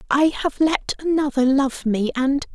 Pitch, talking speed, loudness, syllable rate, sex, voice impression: 280 Hz, 165 wpm, -20 LUFS, 4.2 syllables/s, female, very feminine, adult-like, slightly muffled, slightly fluent, elegant, slightly sweet, kind